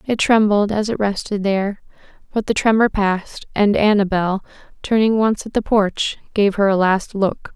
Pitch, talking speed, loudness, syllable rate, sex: 205 Hz, 175 wpm, -18 LUFS, 4.8 syllables/s, female